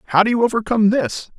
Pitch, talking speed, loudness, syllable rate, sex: 215 Hz, 215 wpm, -17 LUFS, 7.3 syllables/s, male